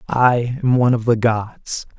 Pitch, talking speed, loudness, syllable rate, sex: 120 Hz, 180 wpm, -18 LUFS, 4.1 syllables/s, male